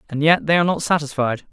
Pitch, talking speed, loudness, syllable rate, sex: 155 Hz, 235 wpm, -18 LUFS, 7.0 syllables/s, male